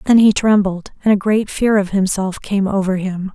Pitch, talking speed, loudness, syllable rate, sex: 200 Hz, 215 wpm, -16 LUFS, 4.9 syllables/s, female